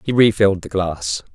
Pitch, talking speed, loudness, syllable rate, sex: 95 Hz, 180 wpm, -18 LUFS, 5.2 syllables/s, male